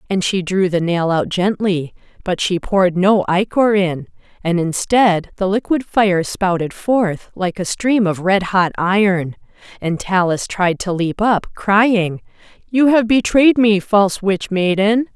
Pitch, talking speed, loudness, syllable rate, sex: 195 Hz, 160 wpm, -16 LUFS, 4.0 syllables/s, female